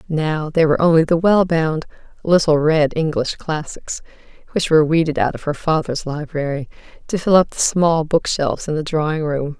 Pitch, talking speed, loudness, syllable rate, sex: 155 Hz, 190 wpm, -18 LUFS, 5.3 syllables/s, female